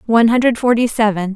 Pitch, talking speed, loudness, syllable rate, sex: 225 Hz, 175 wpm, -14 LUFS, 6.6 syllables/s, female